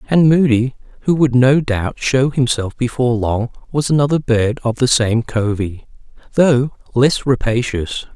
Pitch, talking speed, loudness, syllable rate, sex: 125 Hz, 145 wpm, -16 LUFS, 4.3 syllables/s, male